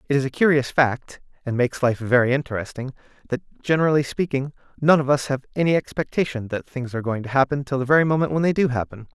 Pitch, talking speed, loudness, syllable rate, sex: 135 Hz, 215 wpm, -22 LUFS, 6.7 syllables/s, male